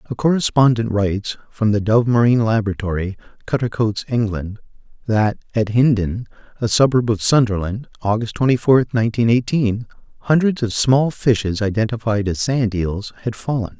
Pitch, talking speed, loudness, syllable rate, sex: 115 Hz, 140 wpm, -18 LUFS, 5.2 syllables/s, male